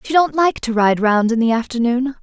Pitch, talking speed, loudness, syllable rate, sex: 250 Hz, 245 wpm, -16 LUFS, 5.3 syllables/s, female